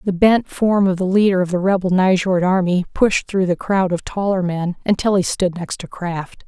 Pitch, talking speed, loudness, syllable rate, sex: 185 Hz, 220 wpm, -18 LUFS, 4.9 syllables/s, female